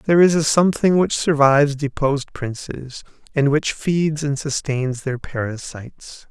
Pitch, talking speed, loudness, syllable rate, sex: 145 Hz, 145 wpm, -19 LUFS, 4.6 syllables/s, male